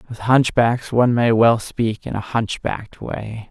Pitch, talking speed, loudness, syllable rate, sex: 115 Hz, 170 wpm, -19 LUFS, 4.2 syllables/s, male